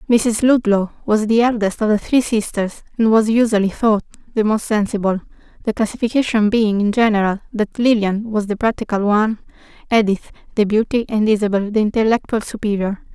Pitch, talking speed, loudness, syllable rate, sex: 215 Hz, 160 wpm, -17 LUFS, 5.5 syllables/s, female